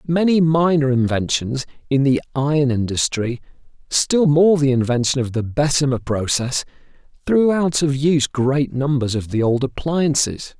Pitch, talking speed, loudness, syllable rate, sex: 140 Hz, 140 wpm, -18 LUFS, 4.6 syllables/s, male